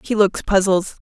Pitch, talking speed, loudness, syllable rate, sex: 195 Hz, 165 wpm, -18 LUFS, 4.8 syllables/s, female